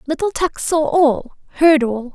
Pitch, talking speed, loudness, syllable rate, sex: 290 Hz, 170 wpm, -16 LUFS, 4.0 syllables/s, female